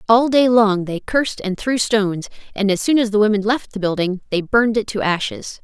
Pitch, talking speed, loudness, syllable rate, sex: 210 Hz, 235 wpm, -18 LUFS, 5.5 syllables/s, female